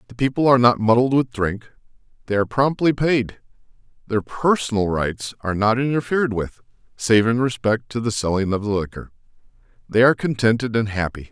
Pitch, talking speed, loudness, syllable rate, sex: 115 Hz, 165 wpm, -20 LUFS, 5.6 syllables/s, male